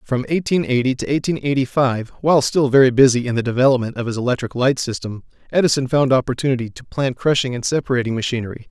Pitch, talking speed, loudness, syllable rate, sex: 130 Hz, 195 wpm, -18 LUFS, 6.6 syllables/s, male